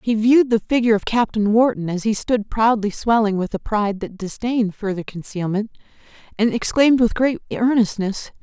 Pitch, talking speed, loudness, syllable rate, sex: 215 Hz, 170 wpm, -19 LUFS, 5.5 syllables/s, female